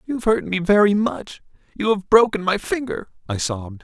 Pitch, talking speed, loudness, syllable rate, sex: 190 Hz, 170 wpm, -20 LUFS, 5.4 syllables/s, male